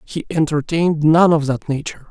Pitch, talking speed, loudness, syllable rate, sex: 155 Hz, 170 wpm, -17 LUFS, 5.6 syllables/s, male